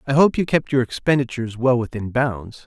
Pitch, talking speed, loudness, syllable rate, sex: 125 Hz, 205 wpm, -20 LUFS, 5.6 syllables/s, male